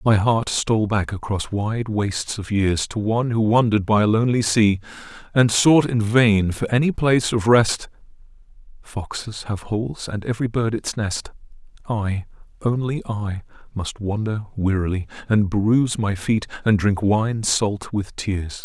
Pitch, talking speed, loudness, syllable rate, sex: 110 Hz, 160 wpm, -21 LUFS, 4.5 syllables/s, male